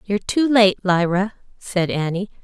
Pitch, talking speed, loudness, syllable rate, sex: 200 Hz, 150 wpm, -19 LUFS, 4.8 syllables/s, female